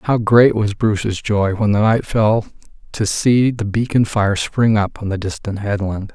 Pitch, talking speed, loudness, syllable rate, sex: 105 Hz, 195 wpm, -17 LUFS, 4.2 syllables/s, male